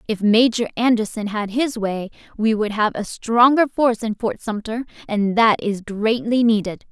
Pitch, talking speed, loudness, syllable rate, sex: 220 Hz, 175 wpm, -19 LUFS, 4.6 syllables/s, female